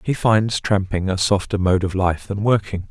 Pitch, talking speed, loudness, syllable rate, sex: 100 Hz, 205 wpm, -19 LUFS, 4.6 syllables/s, male